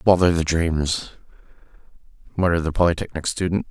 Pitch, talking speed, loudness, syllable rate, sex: 85 Hz, 115 wpm, -21 LUFS, 5.8 syllables/s, male